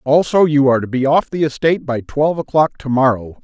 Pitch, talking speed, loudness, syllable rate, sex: 140 Hz, 210 wpm, -16 LUFS, 6.1 syllables/s, male